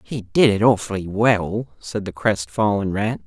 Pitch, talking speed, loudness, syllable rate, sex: 105 Hz, 165 wpm, -20 LUFS, 4.2 syllables/s, male